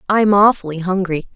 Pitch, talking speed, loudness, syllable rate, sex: 190 Hz, 135 wpm, -15 LUFS, 5.4 syllables/s, female